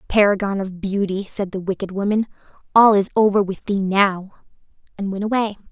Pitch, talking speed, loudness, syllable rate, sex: 200 Hz, 170 wpm, -19 LUFS, 5.4 syllables/s, female